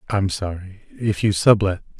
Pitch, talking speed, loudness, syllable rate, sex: 95 Hz, 120 wpm, -20 LUFS, 4.8 syllables/s, male